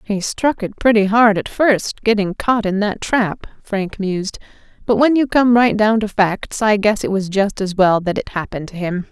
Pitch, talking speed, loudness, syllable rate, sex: 205 Hz, 225 wpm, -17 LUFS, 4.7 syllables/s, female